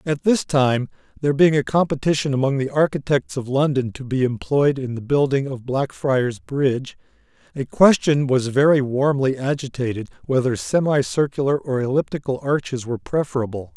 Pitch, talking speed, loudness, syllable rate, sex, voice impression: 135 Hz, 150 wpm, -20 LUFS, 5.2 syllables/s, male, very masculine, very middle-aged, thick, slightly relaxed, powerful, bright, soft, slightly muffled, fluent, slightly raspy, slightly cool, intellectual, slightly refreshing, sincere, very calm, very mature, friendly, reassuring, unique, slightly elegant, wild, slightly sweet, lively, kind